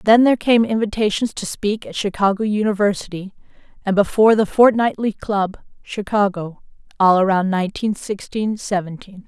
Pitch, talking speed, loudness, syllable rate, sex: 205 Hz, 125 wpm, -18 LUFS, 5.2 syllables/s, female